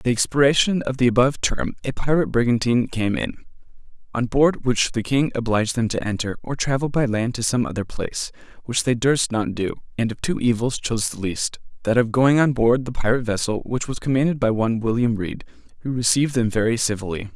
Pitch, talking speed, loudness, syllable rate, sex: 120 Hz, 210 wpm, -21 LUFS, 6.1 syllables/s, male